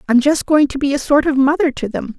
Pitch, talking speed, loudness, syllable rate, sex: 280 Hz, 300 wpm, -15 LUFS, 6.0 syllables/s, female